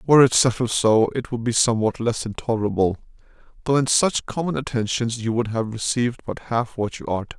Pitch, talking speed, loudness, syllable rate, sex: 120 Hz, 195 wpm, -21 LUFS, 5.6 syllables/s, male